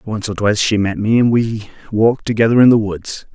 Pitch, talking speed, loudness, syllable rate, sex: 110 Hz, 235 wpm, -15 LUFS, 5.9 syllables/s, male